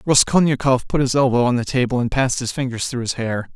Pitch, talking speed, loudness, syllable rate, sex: 125 Hz, 235 wpm, -19 LUFS, 6.1 syllables/s, male